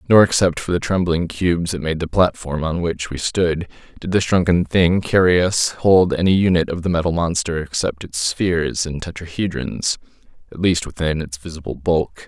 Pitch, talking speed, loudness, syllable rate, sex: 85 Hz, 180 wpm, -19 LUFS, 5.0 syllables/s, male